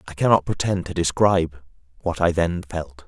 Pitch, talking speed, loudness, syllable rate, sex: 85 Hz, 175 wpm, -22 LUFS, 5.2 syllables/s, male